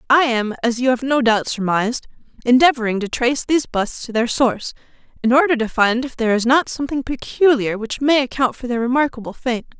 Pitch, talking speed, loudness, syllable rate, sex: 245 Hz, 200 wpm, -18 LUFS, 6.0 syllables/s, female